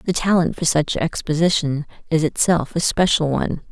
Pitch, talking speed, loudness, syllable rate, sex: 160 Hz, 160 wpm, -19 LUFS, 5.2 syllables/s, female